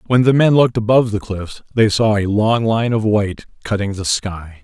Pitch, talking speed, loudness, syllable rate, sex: 105 Hz, 220 wpm, -16 LUFS, 5.3 syllables/s, male